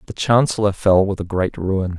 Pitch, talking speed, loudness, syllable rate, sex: 95 Hz, 210 wpm, -18 LUFS, 5.0 syllables/s, male